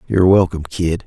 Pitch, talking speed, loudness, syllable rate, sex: 90 Hz, 170 wpm, -16 LUFS, 6.6 syllables/s, male